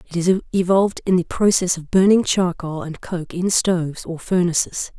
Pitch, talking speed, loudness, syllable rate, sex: 175 Hz, 180 wpm, -19 LUFS, 4.9 syllables/s, female